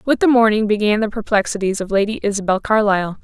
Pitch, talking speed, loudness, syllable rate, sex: 210 Hz, 185 wpm, -17 LUFS, 6.5 syllables/s, female